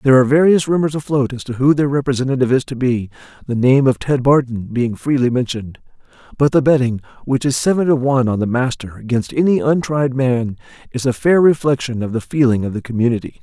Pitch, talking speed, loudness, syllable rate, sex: 130 Hz, 205 wpm, -16 LUFS, 6.2 syllables/s, male